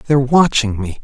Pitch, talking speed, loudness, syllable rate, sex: 130 Hz, 175 wpm, -14 LUFS, 5.9 syllables/s, male